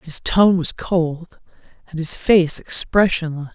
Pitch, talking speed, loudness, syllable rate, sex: 170 Hz, 135 wpm, -18 LUFS, 3.8 syllables/s, female